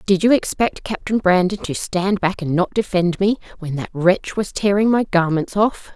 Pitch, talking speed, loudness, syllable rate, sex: 190 Hz, 200 wpm, -19 LUFS, 4.7 syllables/s, female